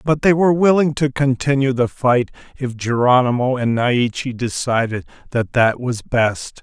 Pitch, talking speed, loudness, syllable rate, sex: 125 Hz, 155 wpm, -17 LUFS, 4.5 syllables/s, male